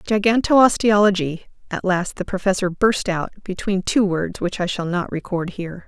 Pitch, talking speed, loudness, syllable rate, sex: 190 Hz, 165 wpm, -20 LUFS, 4.8 syllables/s, female